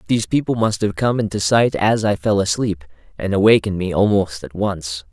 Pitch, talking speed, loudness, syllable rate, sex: 100 Hz, 200 wpm, -18 LUFS, 5.5 syllables/s, male